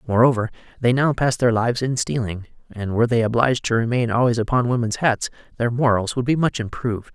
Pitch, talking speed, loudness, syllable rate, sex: 120 Hz, 200 wpm, -20 LUFS, 6.1 syllables/s, male